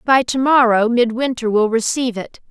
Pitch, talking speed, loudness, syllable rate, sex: 240 Hz, 165 wpm, -16 LUFS, 5.1 syllables/s, female